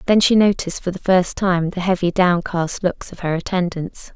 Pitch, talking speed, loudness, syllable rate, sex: 180 Hz, 200 wpm, -19 LUFS, 5.0 syllables/s, female